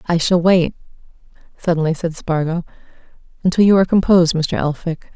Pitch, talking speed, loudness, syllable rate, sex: 170 Hz, 140 wpm, -17 LUFS, 6.0 syllables/s, female